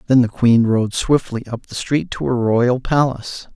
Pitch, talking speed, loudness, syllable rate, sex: 120 Hz, 205 wpm, -18 LUFS, 4.5 syllables/s, male